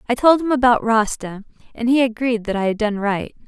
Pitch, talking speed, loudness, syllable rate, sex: 235 Hz, 225 wpm, -18 LUFS, 5.5 syllables/s, female